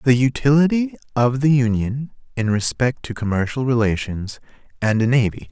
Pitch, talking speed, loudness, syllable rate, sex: 125 Hz, 140 wpm, -19 LUFS, 5.0 syllables/s, male